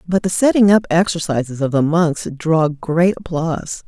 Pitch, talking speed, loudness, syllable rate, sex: 165 Hz, 170 wpm, -17 LUFS, 4.7 syllables/s, female